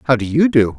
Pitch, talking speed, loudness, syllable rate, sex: 125 Hz, 305 wpm, -15 LUFS, 6.4 syllables/s, male